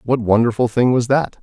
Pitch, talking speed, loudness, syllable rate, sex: 120 Hz, 210 wpm, -16 LUFS, 5.4 syllables/s, male